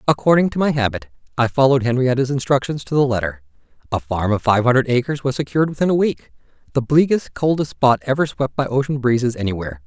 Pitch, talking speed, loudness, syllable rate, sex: 125 Hz, 195 wpm, -18 LUFS, 6.5 syllables/s, male